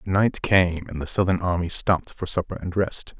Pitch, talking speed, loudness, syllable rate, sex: 90 Hz, 205 wpm, -23 LUFS, 5.0 syllables/s, male